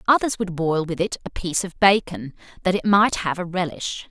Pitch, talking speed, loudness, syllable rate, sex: 180 Hz, 220 wpm, -21 LUFS, 5.4 syllables/s, female